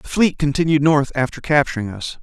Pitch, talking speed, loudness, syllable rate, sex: 145 Hz, 190 wpm, -18 LUFS, 5.5 syllables/s, male